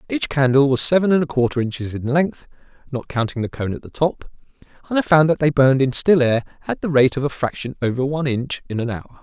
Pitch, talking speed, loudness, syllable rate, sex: 140 Hz, 245 wpm, -19 LUFS, 6.2 syllables/s, male